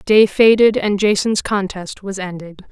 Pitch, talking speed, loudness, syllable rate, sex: 200 Hz, 155 wpm, -15 LUFS, 4.3 syllables/s, female